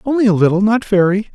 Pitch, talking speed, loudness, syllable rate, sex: 205 Hz, 180 wpm, -14 LUFS, 6.8 syllables/s, male